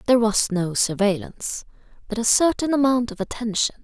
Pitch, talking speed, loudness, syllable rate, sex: 225 Hz, 155 wpm, -21 LUFS, 5.7 syllables/s, female